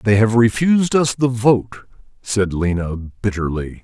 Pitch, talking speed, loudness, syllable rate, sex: 110 Hz, 140 wpm, -17 LUFS, 4.5 syllables/s, male